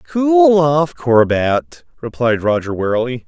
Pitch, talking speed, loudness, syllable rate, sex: 135 Hz, 110 wpm, -15 LUFS, 3.6 syllables/s, male